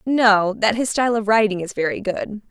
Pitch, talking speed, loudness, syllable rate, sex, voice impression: 210 Hz, 215 wpm, -19 LUFS, 5.3 syllables/s, female, very feminine, very adult-like, thin, tensed, powerful, slightly bright, slightly soft, very clear, very fluent, very cool, very intellectual, very refreshing, sincere, slightly calm, very friendly, very reassuring, unique, elegant, wild, sweet, lively, kind, slightly intense, slightly light